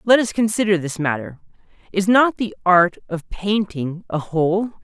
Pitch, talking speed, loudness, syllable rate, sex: 190 Hz, 160 wpm, -19 LUFS, 4.6 syllables/s, male